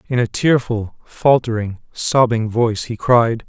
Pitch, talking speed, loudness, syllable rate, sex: 115 Hz, 140 wpm, -17 LUFS, 4.1 syllables/s, male